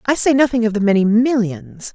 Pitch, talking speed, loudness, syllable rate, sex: 220 Hz, 215 wpm, -15 LUFS, 5.5 syllables/s, female